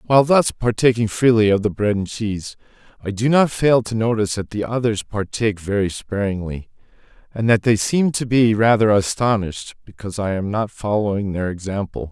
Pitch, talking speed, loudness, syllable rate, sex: 105 Hz, 180 wpm, -19 LUFS, 5.5 syllables/s, male